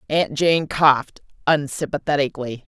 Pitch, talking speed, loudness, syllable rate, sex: 145 Hz, 85 wpm, -20 LUFS, 4.9 syllables/s, female